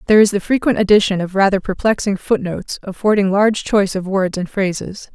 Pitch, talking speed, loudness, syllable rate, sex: 200 Hz, 200 wpm, -16 LUFS, 6.1 syllables/s, female